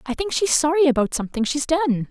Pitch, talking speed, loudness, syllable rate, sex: 285 Hz, 230 wpm, -20 LUFS, 6.0 syllables/s, female